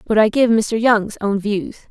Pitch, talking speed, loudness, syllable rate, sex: 215 Hz, 220 wpm, -17 LUFS, 4.4 syllables/s, female